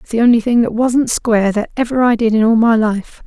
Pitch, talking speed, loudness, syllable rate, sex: 230 Hz, 275 wpm, -14 LUFS, 5.7 syllables/s, female